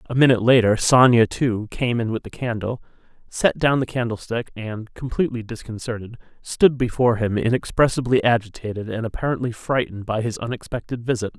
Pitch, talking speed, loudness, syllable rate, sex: 115 Hz, 155 wpm, -21 LUFS, 5.8 syllables/s, male